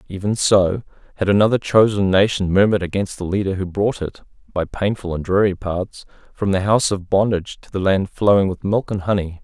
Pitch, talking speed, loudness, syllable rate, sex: 100 Hz, 195 wpm, -19 LUFS, 5.6 syllables/s, male